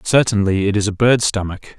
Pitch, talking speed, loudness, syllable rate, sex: 105 Hz, 200 wpm, -16 LUFS, 5.4 syllables/s, male